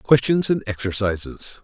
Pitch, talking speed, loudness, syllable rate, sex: 115 Hz, 110 wpm, -21 LUFS, 4.5 syllables/s, male